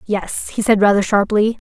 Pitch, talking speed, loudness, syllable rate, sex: 210 Hz, 180 wpm, -16 LUFS, 4.9 syllables/s, female